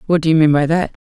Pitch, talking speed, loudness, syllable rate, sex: 160 Hz, 350 wpm, -14 LUFS, 7.3 syllables/s, female